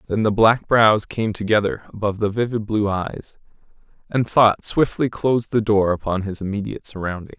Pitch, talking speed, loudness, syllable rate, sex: 105 Hz, 170 wpm, -20 LUFS, 5.3 syllables/s, male